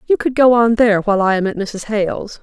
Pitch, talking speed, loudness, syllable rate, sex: 215 Hz, 275 wpm, -15 LUFS, 6.2 syllables/s, female